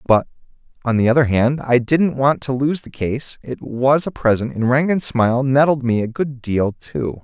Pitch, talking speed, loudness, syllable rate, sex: 130 Hz, 190 wpm, -18 LUFS, 4.6 syllables/s, male